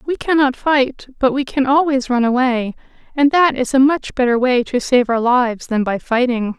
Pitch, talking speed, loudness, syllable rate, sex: 255 Hz, 210 wpm, -16 LUFS, 4.9 syllables/s, female